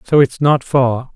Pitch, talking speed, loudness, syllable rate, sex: 130 Hz, 210 wpm, -15 LUFS, 3.9 syllables/s, male